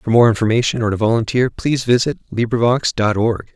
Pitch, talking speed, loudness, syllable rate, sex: 115 Hz, 185 wpm, -17 LUFS, 6.0 syllables/s, male